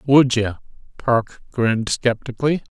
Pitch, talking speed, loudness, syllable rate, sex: 125 Hz, 110 wpm, -20 LUFS, 4.3 syllables/s, male